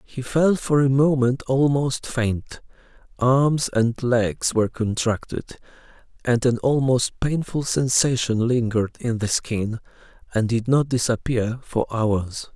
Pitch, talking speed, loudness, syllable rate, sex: 125 Hz, 130 wpm, -22 LUFS, 3.9 syllables/s, male